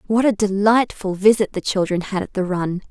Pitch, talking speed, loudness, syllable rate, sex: 200 Hz, 205 wpm, -19 LUFS, 5.2 syllables/s, female